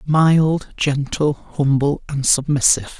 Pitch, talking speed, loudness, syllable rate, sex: 145 Hz, 100 wpm, -18 LUFS, 3.6 syllables/s, male